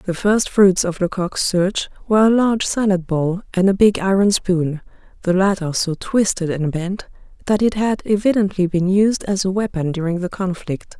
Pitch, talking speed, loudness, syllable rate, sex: 190 Hz, 185 wpm, -18 LUFS, 4.8 syllables/s, female